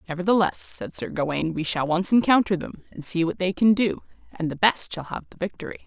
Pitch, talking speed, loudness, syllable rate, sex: 180 Hz, 225 wpm, -23 LUFS, 6.0 syllables/s, female